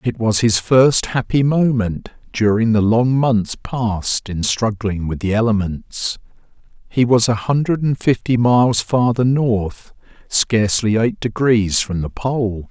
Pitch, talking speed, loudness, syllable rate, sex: 115 Hz, 145 wpm, -17 LUFS, 4.0 syllables/s, male